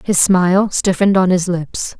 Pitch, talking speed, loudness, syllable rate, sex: 185 Hz, 180 wpm, -14 LUFS, 4.8 syllables/s, female